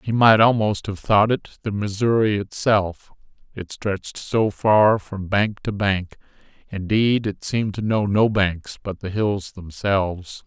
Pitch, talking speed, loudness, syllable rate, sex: 105 Hz, 160 wpm, -21 LUFS, 4.0 syllables/s, male